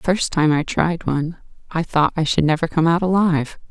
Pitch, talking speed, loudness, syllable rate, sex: 165 Hz, 225 wpm, -19 LUFS, 5.5 syllables/s, female